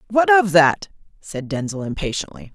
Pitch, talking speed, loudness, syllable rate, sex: 170 Hz, 140 wpm, -18 LUFS, 5.0 syllables/s, female